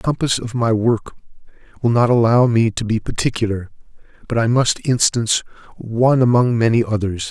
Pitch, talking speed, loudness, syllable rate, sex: 115 Hz, 165 wpm, -17 LUFS, 5.5 syllables/s, male